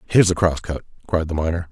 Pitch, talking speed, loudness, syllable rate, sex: 85 Hz, 245 wpm, -21 LUFS, 6.7 syllables/s, male